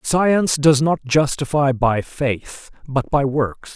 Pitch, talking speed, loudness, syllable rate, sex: 140 Hz, 145 wpm, -18 LUFS, 3.5 syllables/s, male